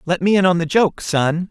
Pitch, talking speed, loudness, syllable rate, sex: 175 Hz, 280 wpm, -17 LUFS, 5.0 syllables/s, male